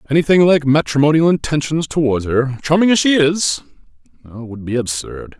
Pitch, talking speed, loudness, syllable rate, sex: 145 Hz, 145 wpm, -15 LUFS, 5.1 syllables/s, male